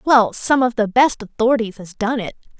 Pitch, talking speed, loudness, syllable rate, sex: 230 Hz, 210 wpm, -18 LUFS, 5.2 syllables/s, female